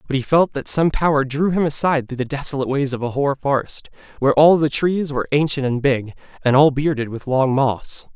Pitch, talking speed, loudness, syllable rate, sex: 140 Hz, 230 wpm, -18 LUFS, 5.8 syllables/s, male